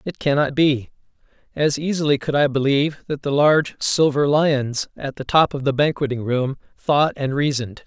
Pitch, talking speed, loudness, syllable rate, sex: 140 Hz, 170 wpm, -20 LUFS, 5.0 syllables/s, male